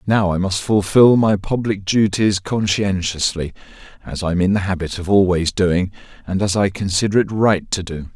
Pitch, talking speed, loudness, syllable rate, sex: 100 Hz, 185 wpm, -18 LUFS, 4.9 syllables/s, male